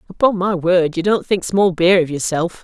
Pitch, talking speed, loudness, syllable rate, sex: 180 Hz, 230 wpm, -16 LUFS, 4.9 syllables/s, female